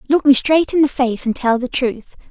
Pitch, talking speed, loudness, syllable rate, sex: 265 Hz, 260 wpm, -16 LUFS, 5.0 syllables/s, female